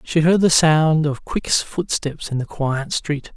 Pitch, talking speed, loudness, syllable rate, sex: 150 Hz, 195 wpm, -19 LUFS, 3.7 syllables/s, male